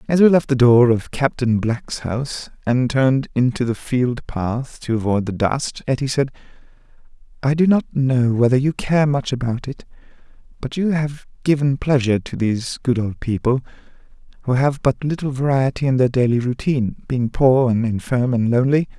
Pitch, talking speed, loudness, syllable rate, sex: 130 Hz, 175 wpm, -19 LUFS, 5.0 syllables/s, male